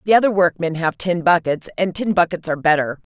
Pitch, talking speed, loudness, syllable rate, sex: 170 Hz, 210 wpm, -18 LUFS, 6.0 syllables/s, female